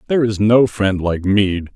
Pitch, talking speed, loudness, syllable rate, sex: 105 Hz, 205 wpm, -16 LUFS, 4.6 syllables/s, male